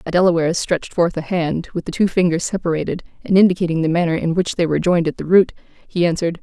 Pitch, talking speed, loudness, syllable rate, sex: 170 Hz, 235 wpm, -18 LUFS, 7.0 syllables/s, female